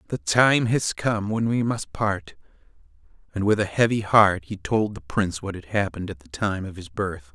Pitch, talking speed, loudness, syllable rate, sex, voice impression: 100 Hz, 210 wpm, -23 LUFS, 4.9 syllables/s, male, masculine, adult-like, slightly thick, cool, slightly refreshing, sincere